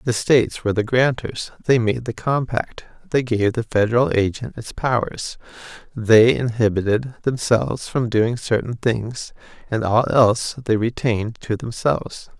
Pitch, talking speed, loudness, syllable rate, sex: 115 Hz, 145 wpm, -20 LUFS, 4.5 syllables/s, male